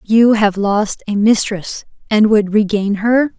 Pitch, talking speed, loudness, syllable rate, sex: 210 Hz, 160 wpm, -14 LUFS, 3.7 syllables/s, female